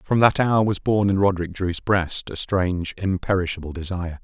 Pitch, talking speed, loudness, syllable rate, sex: 95 Hz, 185 wpm, -22 LUFS, 5.4 syllables/s, male